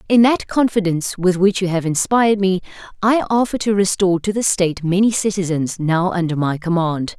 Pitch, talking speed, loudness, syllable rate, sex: 190 Hz, 185 wpm, -17 LUFS, 5.4 syllables/s, female